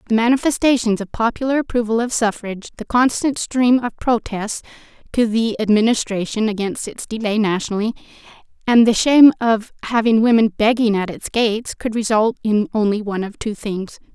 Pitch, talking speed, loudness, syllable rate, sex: 225 Hz, 155 wpm, -18 LUFS, 5.5 syllables/s, female